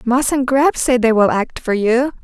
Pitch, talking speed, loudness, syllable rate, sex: 250 Hz, 240 wpm, -15 LUFS, 4.5 syllables/s, female